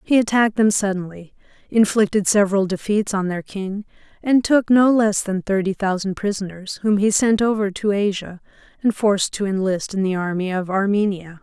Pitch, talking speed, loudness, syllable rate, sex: 200 Hz, 175 wpm, -19 LUFS, 5.2 syllables/s, female